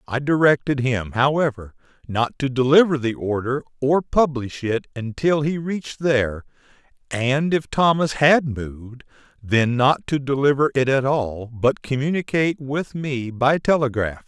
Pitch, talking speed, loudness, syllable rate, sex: 135 Hz, 145 wpm, -20 LUFS, 4.4 syllables/s, male